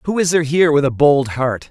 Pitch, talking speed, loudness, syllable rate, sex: 145 Hz, 280 wpm, -15 LUFS, 6.4 syllables/s, male